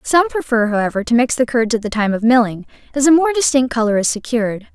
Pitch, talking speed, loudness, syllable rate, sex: 245 Hz, 240 wpm, -16 LUFS, 6.2 syllables/s, female